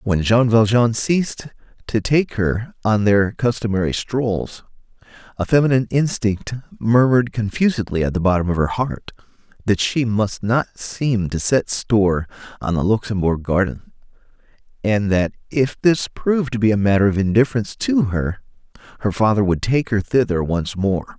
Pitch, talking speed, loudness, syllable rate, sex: 110 Hz, 155 wpm, -19 LUFS, 4.9 syllables/s, male